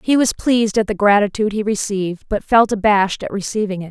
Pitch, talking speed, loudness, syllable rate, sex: 210 Hz, 215 wpm, -17 LUFS, 6.3 syllables/s, female